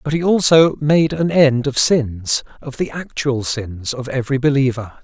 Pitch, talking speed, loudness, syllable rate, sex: 135 Hz, 165 wpm, -17 LUFS, 4.5 syllables/s, male